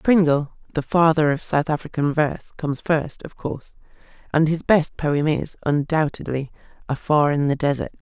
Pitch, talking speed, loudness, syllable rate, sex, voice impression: 150 Hz, 155 wpm, -21 LUFS, 5.0 syllables/s, female, slightly feminine, adult-like, slightly intellectual, slightly calm, slightly elegant